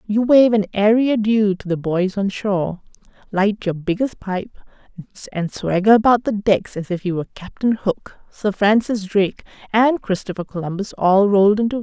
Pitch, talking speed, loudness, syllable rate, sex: 205 Hz, 180 wpm, -18 LUFS, 5.2 syllables/s, female